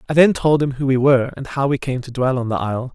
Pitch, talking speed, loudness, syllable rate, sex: 135 Hz, 325 wpm, -18 LUFS, 6.6 syllables/s, male